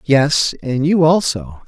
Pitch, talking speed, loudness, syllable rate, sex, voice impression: 145 Hz, 145 wpm, -15 LUFS, 3.5 syllables/s, male, very masculine, very adult-like, middle-aged, thick, very tensed, powerful, very bright, soft, very clear, very fluent, cool, very intellectual, very refreshing, sincere, very calm, very friendly, very reassuring, unique, very elegant, slightly wild, very sweet, very lively, very kind, very light